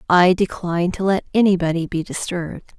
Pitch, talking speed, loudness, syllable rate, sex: 180 Hz, 150 wpm, -19 LUFS, 5.9 syllables/s, female